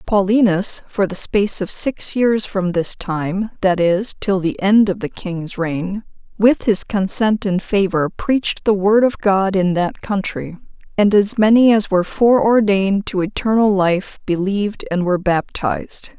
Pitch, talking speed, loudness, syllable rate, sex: 200 Hz, 165 wpm, -17 LUFS, 4.3 syllables/s, female